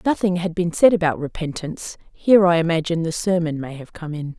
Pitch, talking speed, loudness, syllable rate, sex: 170 Hz, 205 wpm, -20 LUFS, 6.1 syllables/s, female